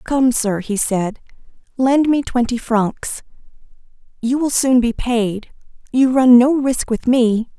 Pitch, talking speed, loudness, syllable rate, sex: 245 Hz, 150 wpm, -16 LUFS, 3.7 syllables/s, female